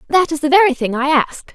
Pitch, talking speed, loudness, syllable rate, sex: 300 Hz, 270 wpm, -15 LUFS, 5.9 syllables/s, female